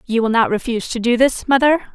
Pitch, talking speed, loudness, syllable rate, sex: 245 Hz, 245 wpm, -17 LUFS, 6.3 syllables/s, female